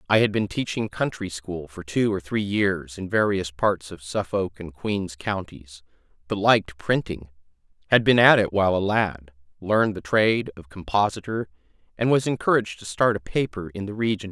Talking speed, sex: 200 wpm, male